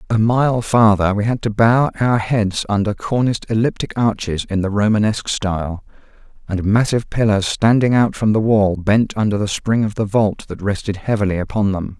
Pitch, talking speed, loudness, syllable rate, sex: 105 Hz, 185 wpm, -17 LUFS, 5.2 syllables/s, male